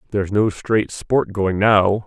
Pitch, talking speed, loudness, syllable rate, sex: 105 Hz, 175 wpm, -18 LUFS, 3.9 syllables/s, male